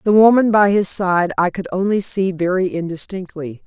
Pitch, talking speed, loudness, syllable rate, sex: 190 Hz, 180 wpm, -17 LUFS, 4.9 syllables/s, female